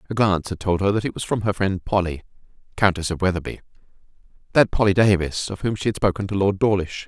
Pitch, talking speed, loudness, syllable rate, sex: 95 Hz, 220 wpm, -21 LUFS, 6.5 syllables/s, male